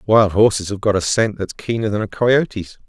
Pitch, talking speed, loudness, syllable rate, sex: 105 Hz, 230 wpm, -18 LUFS, 5.2 syllables/s, male